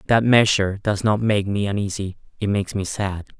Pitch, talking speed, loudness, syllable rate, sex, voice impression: 100 Hz, 195 wpm, -21 LUFS, 5.6 syllables/s, male, masculine, adult-like, tensed, powerful, hard, slightly raspy, cool, calm, slightly mature, friendly, wild, strict, slightly sharp